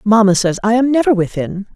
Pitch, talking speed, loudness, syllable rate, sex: 215 Hz, 205 wpm, -14 LUFS, 5.8 syllables/s, female